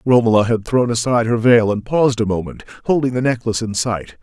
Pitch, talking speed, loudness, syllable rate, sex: 115 Hz, 215 wpm, -17 LUFS, 6.2 syllables/s, male